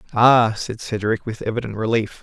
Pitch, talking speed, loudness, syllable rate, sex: 110 Hz, 160 wpm, -20 LUFS, 5.1 syllables/s, male